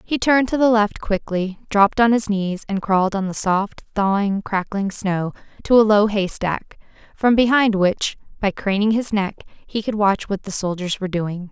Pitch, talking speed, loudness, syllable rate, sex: 205 Hz, 195 wpm, -19 LUFS, 4.8 syllables/s, female